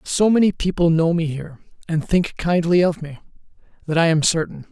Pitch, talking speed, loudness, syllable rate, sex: 165 Hz, 190 wpm, -19 LUFS, 5.4 syllables/s, male